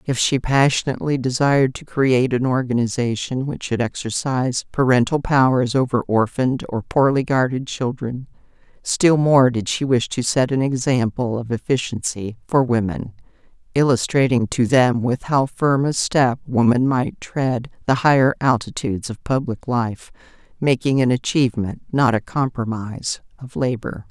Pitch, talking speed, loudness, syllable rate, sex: 125 Hz, 140 wpm, -19 LUFS, 4.7 syllables/s, female